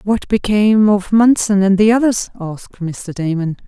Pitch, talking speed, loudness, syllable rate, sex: 205 Hz, 165 wpm, -14 LUFS, 4.7 syllables/s, female